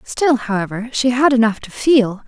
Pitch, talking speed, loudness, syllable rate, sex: 235 Hz, 185 wpm, -16 LUFS, 4.7 syllables/s, female